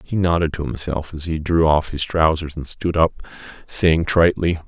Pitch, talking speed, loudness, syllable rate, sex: 80 Hz, 195 wpm, -19 LUFS, 4.9 syllables/s, male